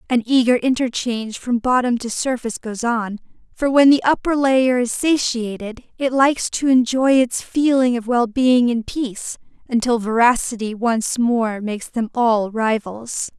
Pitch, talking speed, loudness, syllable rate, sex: 240 Hz, 150 wpm, -18 LUFS, 4.4 syllables/s, female